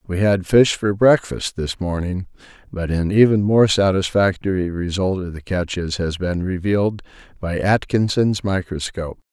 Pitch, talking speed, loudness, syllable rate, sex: 95 Hz, 140 wpm, -19 LUFS, 4.6 syllables/s, male